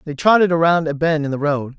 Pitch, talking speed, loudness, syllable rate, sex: 155 Hz, 270 wpm, -17 LUFS, 6.1 syllables/s, male